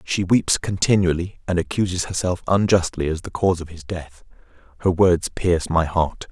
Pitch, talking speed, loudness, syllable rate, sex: 90 Hz, 170 wpm, -21 LUFS, 5.1 syllables/s, male